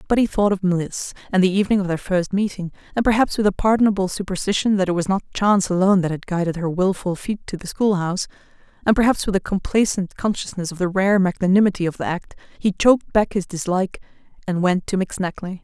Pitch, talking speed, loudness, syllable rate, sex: 190 Hz, 210 wpm, -20 LUFS, 6.4 syllables/s, female